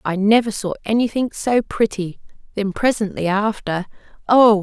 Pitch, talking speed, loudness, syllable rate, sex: 210 Hz, 130 wpm, -19 LUFS, 4.6 syllables/s, female